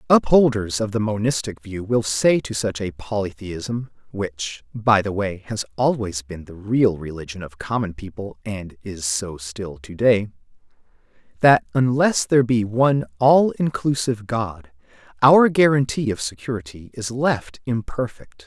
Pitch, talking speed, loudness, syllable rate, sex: 110 Hz, 145 wpm, -21 LUFS, 4.6 syllables/s, male